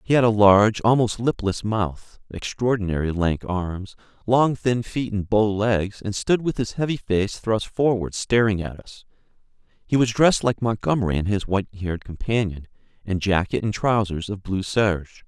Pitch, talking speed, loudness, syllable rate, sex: 105 Hz, 175 wpm, -22 LUFS, 4.9 syllables/s, male